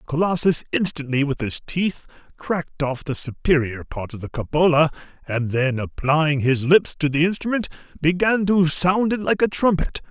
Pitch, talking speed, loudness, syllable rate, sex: 155 Hz, 165 wpm, -21 LUFS, 4.8 syllables/s, male